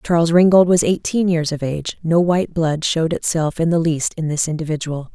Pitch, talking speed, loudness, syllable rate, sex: 165 Hz, 210 wpm, -18 LUFS, 5.6 syllables/s, female